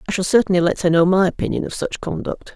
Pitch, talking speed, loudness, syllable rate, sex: 185 Hz, 260 wpm, -19 LUFS, 6.8 syllables/s, female